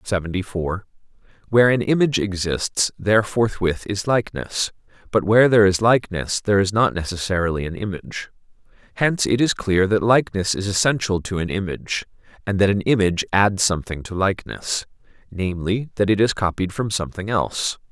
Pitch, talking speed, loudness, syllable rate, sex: 100 Hz, 155 wpm, -20 LUFS, 5.9 syllables/s, male